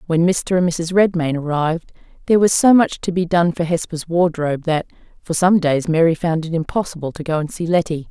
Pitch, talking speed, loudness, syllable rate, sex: 170 Hz, 215 wpm, -18 LUFS, 5.7 syllables/s, female